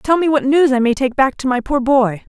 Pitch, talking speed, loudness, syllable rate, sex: 265 Hz, 305 wpm, -15 LUFS, 5.3 syllables/s, female